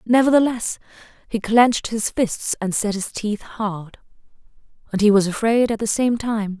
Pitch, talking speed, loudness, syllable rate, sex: 215 Hz, 165 wpm, -20 LUFS, 4.6 syllables/s, female